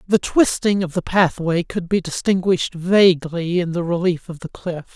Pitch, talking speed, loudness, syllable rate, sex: 175 Hz, 180 wpm, -19 LUFS, 4.8 syllables/s, male